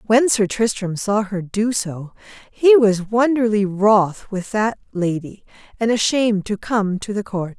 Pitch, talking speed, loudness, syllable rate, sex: 210 Hz, 165 wpm, -19 LUFS, 4.1 syllables/s, female